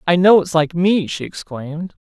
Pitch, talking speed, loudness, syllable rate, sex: 170 Hz, 205 wpm, -16 LUFS, 4.9 syllables/s, male